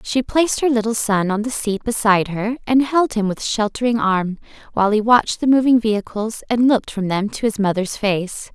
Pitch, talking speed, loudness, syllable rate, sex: 220 Hz, 210 wpm, -18 LUFS, 5.5 syllables/s, female